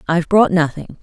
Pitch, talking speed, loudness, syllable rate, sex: 175 Hz, 175 wpm, -15 LUFS, 6.0 syllables/s, female